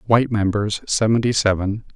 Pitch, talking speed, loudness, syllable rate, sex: 105 Hz, 125 wpm, -19 LUFS, 5.4 syllables/s, male